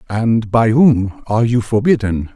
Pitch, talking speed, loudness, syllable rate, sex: 115 Hz, 155 wpm, -15 LUFS, 4.3 syllables/s, male